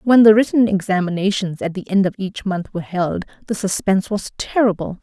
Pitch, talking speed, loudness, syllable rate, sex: 195 Hz, 190 wpm, -18 LUFS, 5.7 syllables/s, female